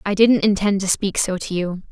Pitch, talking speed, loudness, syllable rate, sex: 195 Hz, 250 wpm, -19 LUFS, 5.1 syllables/s, female